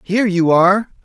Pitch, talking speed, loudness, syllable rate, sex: 190 Hz, 175 wpm, -14 LUFS, 5.8 syllables/s, male